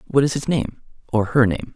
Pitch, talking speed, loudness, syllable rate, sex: 130 Hz, 205 wpm, -21 LUFS, 5.3 syllables/s, male